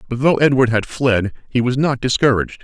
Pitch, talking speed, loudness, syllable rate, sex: 125 Hz, 205 wpm, -17 LUFS, 5.7 syllables/s, male